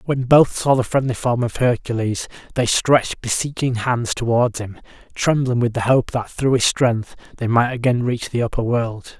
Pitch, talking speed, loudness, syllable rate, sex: 120 Hz, 190 wpm, -19 LUFS, 4.8 syllables/s, male